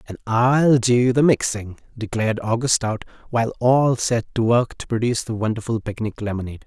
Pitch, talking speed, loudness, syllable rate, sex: 115 Hz, 170 wpm, -20 LUFS, 5.5 syllables/s, male